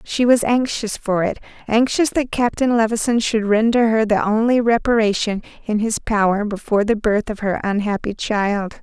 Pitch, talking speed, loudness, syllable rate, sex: 220 Hz, 165 wpm, -18 LUFS, 4.9 syllables/s, female